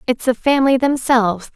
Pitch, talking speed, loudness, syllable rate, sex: 250 Hz, 155 wpm, -16 LUFS, 5.7 syllables/s, female